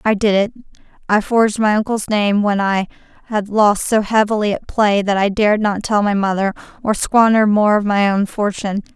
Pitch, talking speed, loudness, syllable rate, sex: 210 Hz, 200 wpm, -16 LUFS, 5.1 syllables/s, female